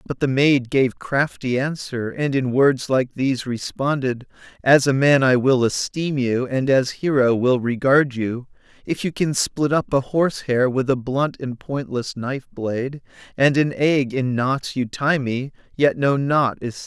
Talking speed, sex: 190 wpm, male